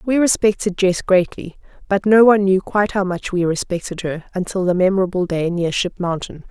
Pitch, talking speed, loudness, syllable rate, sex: 185 Hz, 195 wpm, -18 LUFS, 5.6 syllables/s, female